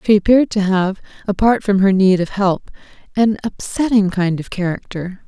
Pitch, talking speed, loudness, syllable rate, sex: 200 Hz, 170 wpm, -17 LUFS, 5.0 syllables/s, female